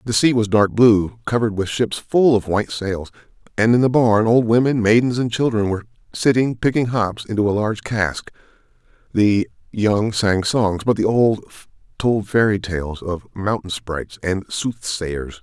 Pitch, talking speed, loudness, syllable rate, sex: 105 Hz, 170 wpm, -19 LUFS, 4.6 syllables/s, male